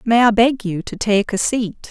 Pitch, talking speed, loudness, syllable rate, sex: 220 Hz, 250 wpm, -17 LUFS, 4.4 syllables/s, female